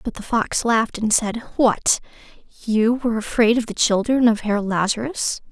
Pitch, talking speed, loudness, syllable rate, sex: 225 Hz, 175 wpm, -20 LUFS, 4.7 syllables/s, female